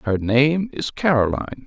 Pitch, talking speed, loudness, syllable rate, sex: 130 Hz, 145 wpm, -20 LUFS, 4.9 syllables/s, male